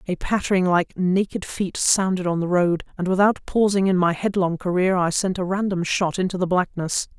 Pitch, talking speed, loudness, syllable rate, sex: 185 Hz, 200 wpm, -21 LUFS, 5.2 syllables/s, female